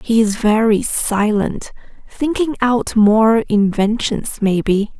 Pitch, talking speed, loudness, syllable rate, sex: 220 Hz, 95 wpm, -16 LUFS, 3.2 syllables/s, female